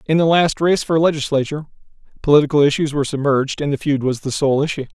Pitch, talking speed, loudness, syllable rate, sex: 145 Hz, 205 wpm, -17 LUFS, 6.9 syllables/s, male